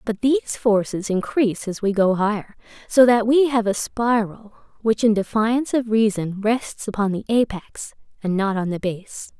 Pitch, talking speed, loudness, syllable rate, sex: 215 Hz, 180 wpm, -20 LUFS, 4.7 syllables/s, female